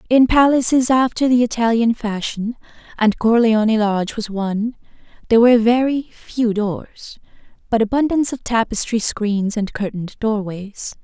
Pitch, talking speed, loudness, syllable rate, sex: 225 Hz, 130 wpm, -18 LUFS, 4.9 syllables/s, female